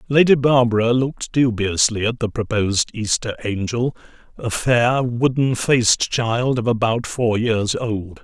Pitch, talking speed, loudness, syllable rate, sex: 115 Hz, 140 wpm, -19 LUFS, 4.3 syllables/s, male